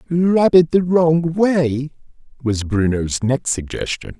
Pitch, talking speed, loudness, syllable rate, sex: 145 Hz, 130 wpm, -17 LUFS, 3.5 syllables/s, male